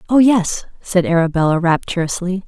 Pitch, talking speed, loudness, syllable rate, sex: 185 Hz, 120 wpm, -16 LUFS, 5.1 syllables/s, female